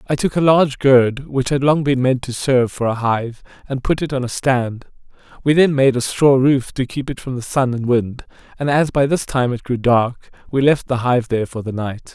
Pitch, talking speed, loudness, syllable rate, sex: 130 Hz, 250 wpm, -17 LUFS, 5.1 syllables/s, male